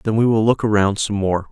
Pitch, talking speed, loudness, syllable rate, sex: 105 Hz, 275 wpm, -18 LUFS, 5.8 syllables/s, male